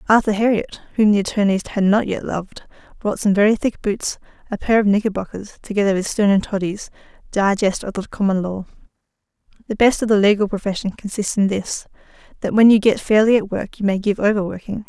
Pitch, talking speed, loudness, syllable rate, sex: 205 Hz, 195 wpm, -19 LUFS, 6.1 syllables/s, female